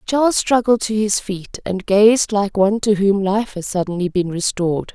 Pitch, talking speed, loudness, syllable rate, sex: 200 Hz, 195 wpm, -17 LUFS, 4.8 syllables/s, female